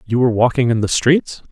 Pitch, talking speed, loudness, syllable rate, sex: 125 Hz, 240 wpm, -16 LUFS, 6.1 syllables/s, male